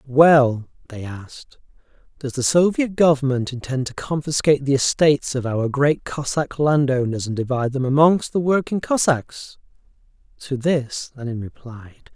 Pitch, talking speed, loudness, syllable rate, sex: 140 Hz, 145 wpm, -20 LUFS, 4.7 syllables/s, male